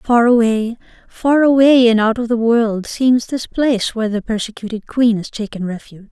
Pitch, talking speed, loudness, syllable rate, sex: 230 Hz, 185 wpm, -15 LUFS, 5.0 syllables/s, female